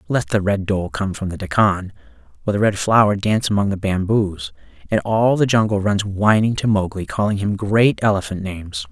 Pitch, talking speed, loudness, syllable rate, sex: 100 Hz, 195 wpm, -19 LUFS, 5.4 syllables/s, male